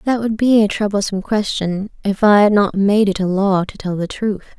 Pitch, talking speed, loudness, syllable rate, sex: 200 Hz, 235 wpm, -16 LUFS, 5.1 syllables/s, female